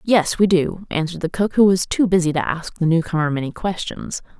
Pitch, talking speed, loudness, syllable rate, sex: 175 Hz, 230 wpm, -19 LUFS, 5.6 syllables/s, female